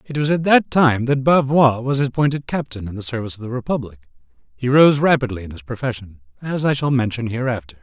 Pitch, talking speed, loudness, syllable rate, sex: 125 Hz, 205 wpm, -18 LUFS, 6.0 syllables/s, male